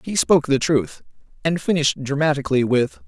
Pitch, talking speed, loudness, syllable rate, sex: 145 Hz, 155 wpm, -20 LUFS, 6.0 syllables/s, male